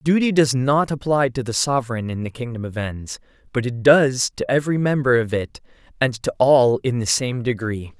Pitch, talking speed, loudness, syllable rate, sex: 125 Hz, 205 wpm, -20 LUFS, 5.1 syllables/s, male